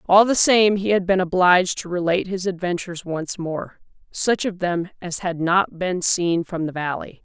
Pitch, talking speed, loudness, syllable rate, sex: 180 Hz, 200 wpm, -21 LUFS, 5.0 syllables/s, female